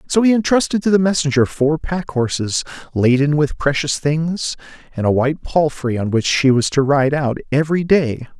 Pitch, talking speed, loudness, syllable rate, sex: 150 Hz, 185 wpm, -17 LUFS, 5.1 syllables/s, male